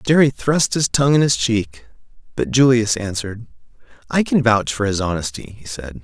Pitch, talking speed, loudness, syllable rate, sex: 110 Hz, 180 wpm, -18 LUFS, 5.2 syllables/s, male